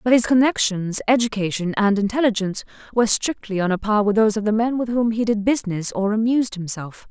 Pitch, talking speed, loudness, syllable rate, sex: 215 Hz, 205 wpm, -20 LUFS, 6.2 syllables/s, female